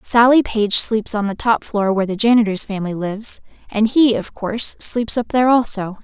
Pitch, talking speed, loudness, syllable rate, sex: 220 Hz, 200 wpm, -17 LUFS, 5.4 syllables/s, female